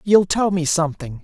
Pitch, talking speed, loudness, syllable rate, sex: 175 Hz, 195 wpm, -19 LUFS, 5.3 syllables/s, male